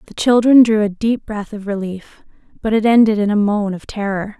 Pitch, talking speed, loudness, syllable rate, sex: 210 Hz, 220 wpm, -16 LUFS, 5.2 syllables/s, female